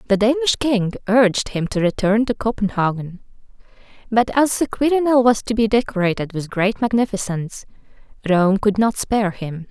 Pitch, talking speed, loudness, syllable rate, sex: 215 Hz, 155 wpm, -19 LUFS, 5.3 syllables/s, female